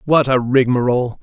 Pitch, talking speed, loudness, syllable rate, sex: 130 Hz, 145 wpm, -16 LUFS, 5.4 syllables/s, male